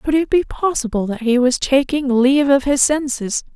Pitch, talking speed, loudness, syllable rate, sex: 270 Hz, 205 wpm, -17 LUFS, 5.0 syllables/s, female